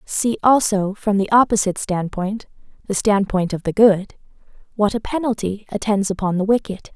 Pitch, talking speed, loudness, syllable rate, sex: 205 Hz, 140 wpm, -19 LUFS, 5.2 syllables/s, female